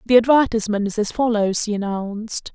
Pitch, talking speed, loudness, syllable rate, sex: 220 Hz, 165 wpm, -20 LUFS, 5.9 syllables/s, female